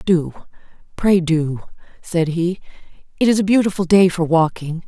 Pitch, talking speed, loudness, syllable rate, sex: 175 Hz, 150 wpm, -17 LUFS, 4.6 syllables/s, female